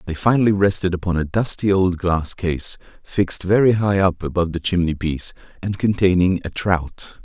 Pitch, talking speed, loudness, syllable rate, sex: 90 Hz, 175 wpm, -19 LUFS, 5.3 syllables/s, male